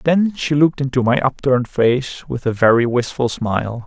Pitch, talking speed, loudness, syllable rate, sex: 130 Hz, 185 wpm, -17 LUFS, 5.1 syllables/s, male